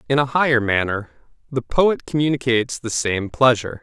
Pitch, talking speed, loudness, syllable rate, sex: 125 Hz, 155 wpm, -19 LUFS, 5.5 syllables/s, male